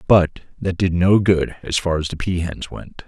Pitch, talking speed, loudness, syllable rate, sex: 90 Hz, 235 wpm, -19 LUFS, 4.4 syllables/s, male